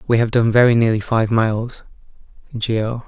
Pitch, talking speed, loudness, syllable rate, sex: 115 Hz, 155 wpm, -17 LUFS, 5.9 syllables/s, male